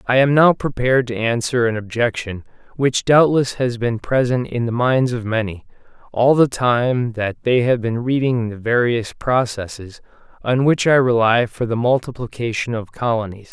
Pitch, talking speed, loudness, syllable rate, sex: 120 Hz, 170 wpm, -18 LUFS, 4.6 syllables/s, male